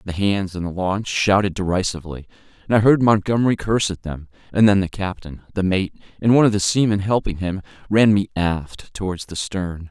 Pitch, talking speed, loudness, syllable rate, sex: 95 Hz, 200 wpm, -20 LUFS, 5.6 syllables/s, male